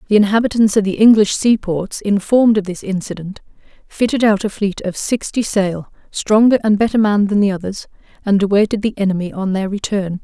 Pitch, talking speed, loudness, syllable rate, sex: 205 Hz, 180 wpm, -16 LUFS, 5.7 syllables/s, female